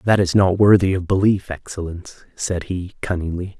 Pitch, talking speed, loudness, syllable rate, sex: 95 Hz, 165 wpm, -19 LUFS, 5.1 syllables/s, male